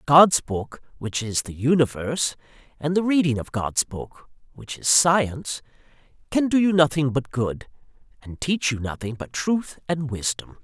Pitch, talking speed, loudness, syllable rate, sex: 145 Hz, 165 wpm, -23 LUFS, 4.5 syllables/s, male